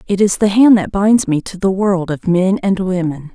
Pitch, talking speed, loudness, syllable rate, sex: 190 Hz, 250 wpm, -14 LUFS, 4.7 syllables/s, female